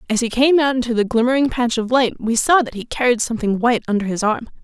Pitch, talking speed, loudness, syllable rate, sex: 240 Hz, 260 wpm, -18 LUFS, 6.5 syllables/s, female